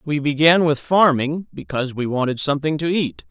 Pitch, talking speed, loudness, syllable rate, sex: 150 Hz, 180 wpm, -19 LUFS, 5.4 syllables/s, male